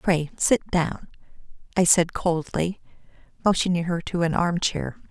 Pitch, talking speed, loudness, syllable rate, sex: 170 Hz, 130 wpm, -23 LUFS, 4.2 syllables/s, female